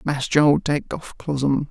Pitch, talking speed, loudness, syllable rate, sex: 145 Hz, 175 wpm, -21 LUFS, 3.8 syllables/s, male